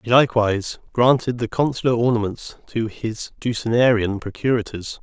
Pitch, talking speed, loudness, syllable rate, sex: 115 Hz, 120 wpm, -21 LUFS, 5.2 syllables/s, male